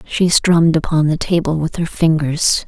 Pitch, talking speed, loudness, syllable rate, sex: 160 Hz, 180 wpm, -15 LUFS, 4.7 syllables/s, female